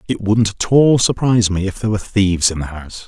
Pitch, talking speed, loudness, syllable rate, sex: 105 Hz, 255 wpm, -16 LUFS, 6.6 syllables/s, male